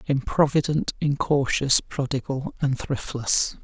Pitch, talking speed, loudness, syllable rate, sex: 140 Hz, 85 wpm, -23 LUFS, 3.9 syllables/s, male